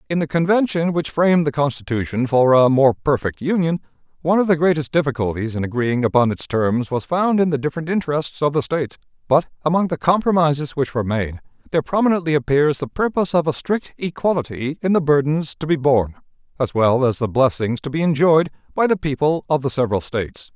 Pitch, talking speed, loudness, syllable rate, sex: 145 Hz, 200 wpm, -19 LUFS, 6.1 syllables/s, male